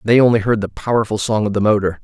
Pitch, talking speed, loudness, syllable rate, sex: 110 Hz, 265 wpm, -16 LUFS, 6.7 syllables/s, male